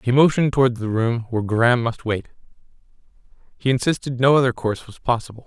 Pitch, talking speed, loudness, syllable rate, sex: 125 Hz, 175 wpm, -20 LUFS, 6.6 syllables/s, male